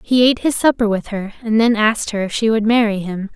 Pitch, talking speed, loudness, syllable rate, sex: 220 Hz, 270 wpm, -17 LUFS, 6.1 syllables/s, female